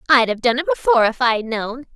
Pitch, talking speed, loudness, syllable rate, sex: 250 Hz, 245 wpm, -17 LUFS, 6.4 syllables/s, female